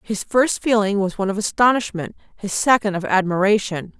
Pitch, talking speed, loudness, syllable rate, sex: 205 Hz, 165 wpm, -19 LUFS, 5.5 syllables/s, female